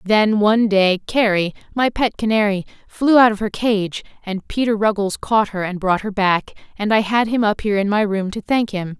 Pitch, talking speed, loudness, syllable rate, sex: 210 Hz, 220 wpm, -18 LUFS, 5.1 syllables/s, female